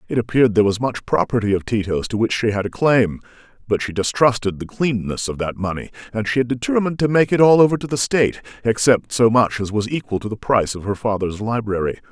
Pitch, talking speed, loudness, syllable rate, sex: 115 Hz, 235 wpm, -19 LUFS, 6.2 syllables/s, male